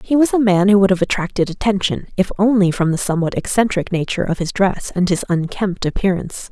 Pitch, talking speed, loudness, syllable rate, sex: 195 Hz, 210 wpm, -17 LUFS, 6.1 syllables/s, female